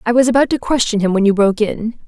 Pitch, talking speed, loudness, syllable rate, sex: 225 Hz, 290 wpm, -15 LUFS, 7.0 syllables/s, female